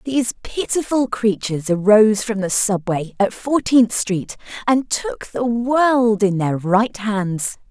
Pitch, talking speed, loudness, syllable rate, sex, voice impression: 220 Hz, 140 wpm, -18 LUFS, 3.8 syllables/s, female, very feminine, very middle-aged, very thin, tensed, powerful, very bright, soft, clear, fluent, cool, very intellectual, very refreshing, sincere, calm, friendly, reassuring, unique, very elegant, wild, sweet, lively, kind, slightly intense, slightly sharp